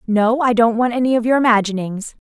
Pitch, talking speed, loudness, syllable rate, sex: 230 Hz, 210 wpm, -16 LUFS, 5.9 syllables/s, female